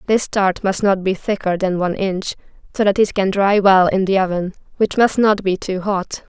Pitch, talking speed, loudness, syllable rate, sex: 195 Hz, 225 wpm, -17 LUFS, 4.9 syllables/s, female